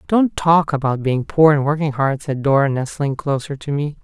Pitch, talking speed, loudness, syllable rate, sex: 145 Hz, 210 wpm, -18 LUFS, 4.9 syllables/s, male